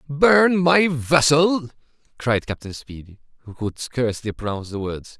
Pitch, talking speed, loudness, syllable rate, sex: 135 Hz, 140 wpm, -20 LUFS, 4.5 syllables/s, male